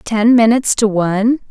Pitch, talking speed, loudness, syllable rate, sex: 220 Hz, 160 wpm, -13 LUFS, 5.1 syllables/s, female